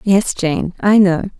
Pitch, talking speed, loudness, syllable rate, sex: 190 Hz, 170 wpm, -15 LUFS, 3.5 syllables/s, female